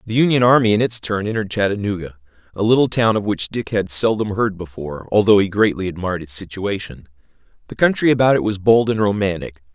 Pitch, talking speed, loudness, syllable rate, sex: 100 Hz, 195 wpm, -18 LUFS, 6.2 syllables/s, male